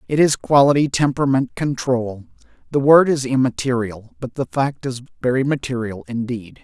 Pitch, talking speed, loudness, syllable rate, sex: 130 Hz, 135 wpm, -19 LUFS, 5.1 syllables/s, male